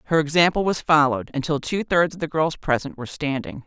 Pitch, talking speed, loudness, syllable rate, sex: 155 Hz, 215 wpm, -21 LUFS, 6.1 syllables/s, female